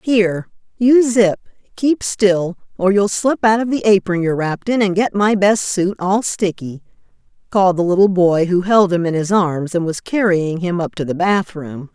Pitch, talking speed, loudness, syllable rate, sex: 190 Hz, 200 wpm, -16 LUFS, 4.8 syllables/s, female